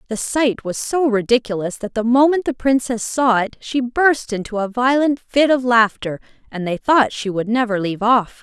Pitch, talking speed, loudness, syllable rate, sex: 240 Hz, 200 wpm, -18 LUFS, 4.8 syllables/s, female